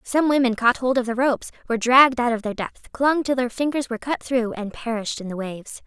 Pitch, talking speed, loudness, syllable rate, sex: 245 Hz, 255 wpm, -22 LUFS, 6.2 syllables/s, female